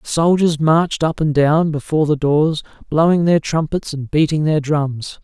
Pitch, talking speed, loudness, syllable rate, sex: 155 Hz, 170 wpm, -16 LUFS, 4.5 syllables/s, male